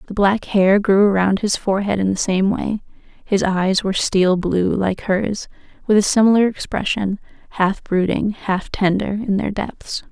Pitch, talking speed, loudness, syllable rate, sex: 200 Hz, 170 wpm, -18 LUFS, 4.5 syllables/s, female